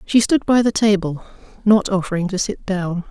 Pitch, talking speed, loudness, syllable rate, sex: 195 Hz, 195 wpm, -18 LUFS, 5.1 syllables/s, female